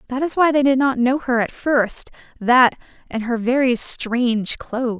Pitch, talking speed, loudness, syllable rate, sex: 250 Hz, 190 wpm, -18 LUFS, 4.5 syllables/s, female